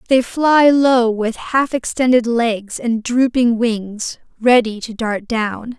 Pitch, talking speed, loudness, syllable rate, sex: 235 Hz, 145 wpm, -16 LUFS, 3.4 syllables/s, female